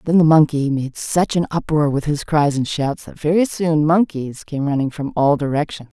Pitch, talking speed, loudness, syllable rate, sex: 150 Hz, 210 wpm, -18 LUFS, 4.9 syllables/s, female